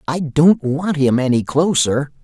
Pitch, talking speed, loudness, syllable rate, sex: 150 Hz, 160 wpm, -16 LUFS, 4.0 syllables/s, male